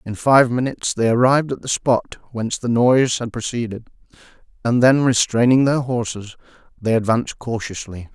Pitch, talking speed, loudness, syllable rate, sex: 120 Hz, 155 wpm, -18 LUFS, 5.2 syllables/s, male